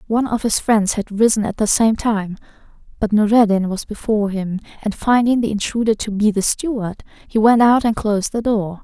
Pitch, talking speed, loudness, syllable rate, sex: 215 Hz, 205 wpm, -17 LUFS, 5.4 syllables/s, female